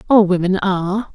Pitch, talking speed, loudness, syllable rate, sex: 195 Hz, 155 wpm, -17 LUFS, 5.4 syllables/s, female